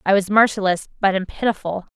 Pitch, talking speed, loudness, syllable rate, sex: 195 Hz, 185 wpm, -19 LUFS, 6.0 syllables/s, female